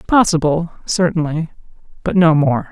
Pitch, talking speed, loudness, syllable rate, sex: 165 Hz, 110 wpm, -16 LUFS, 4.8 syllables/s, female